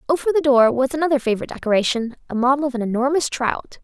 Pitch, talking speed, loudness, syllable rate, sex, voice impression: 265 Hz, 205 wpm, -19 LUFS, 7.2 syllables/s, female, very feminine, very young, thin, tensed, slightly powerful, very bright, very soft, very clear, fluent, very cute, intellectual, very refreshing, sincere, very calm, very friendly, very reassuring, very unique, elegant, slightly wild, very sweet, very lively, slightly kind, intense, sharp, very light